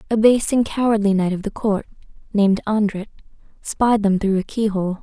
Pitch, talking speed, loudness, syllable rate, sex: 205 Hz, 180 wpm, -19 LUFS, 5.5 syllables/s, female